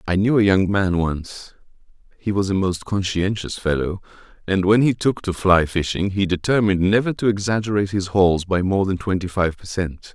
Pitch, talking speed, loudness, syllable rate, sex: 95 Hz, 195 wpm, -20 LUFS, 5.2 syllables/s, male